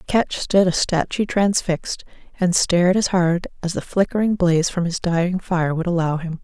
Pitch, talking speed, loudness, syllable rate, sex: 180 Hz, 185 wpm, -20 LUFS, 5.0 syllables/s, female